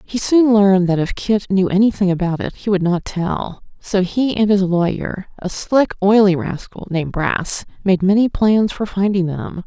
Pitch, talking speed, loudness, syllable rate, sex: 195 Hz, 190 wpm, -17 LUFS, 3.9 syllables/s, female